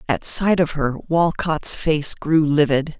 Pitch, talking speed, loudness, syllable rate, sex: 155 Hz, 160 wpm, -19 LUFS, 3.7 syllables/s, female